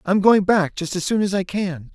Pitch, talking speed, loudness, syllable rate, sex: 190 Hz, 280 wpm, -20 LUFS, 5.0 syllables/s, male